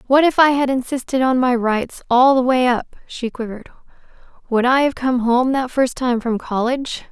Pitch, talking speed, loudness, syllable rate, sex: 250 Hz, 200 wpm, -18 LUFS, 5.2 syllables/s, female